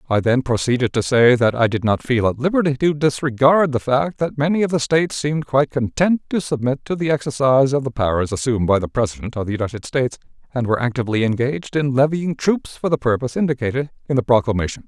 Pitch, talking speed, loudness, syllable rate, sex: 130 Hz, 220 wpm, -19 LUFS, 6.5 syllables/s, male